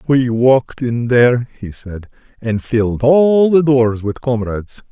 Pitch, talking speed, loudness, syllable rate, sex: 125 Hz, 160 wpm, -14 LUFS, 4.2 syllables/s, male